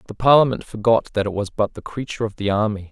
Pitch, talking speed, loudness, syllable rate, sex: 110 Hz, 245 wpm, -20 LUFS, 6.6 syllables/s, male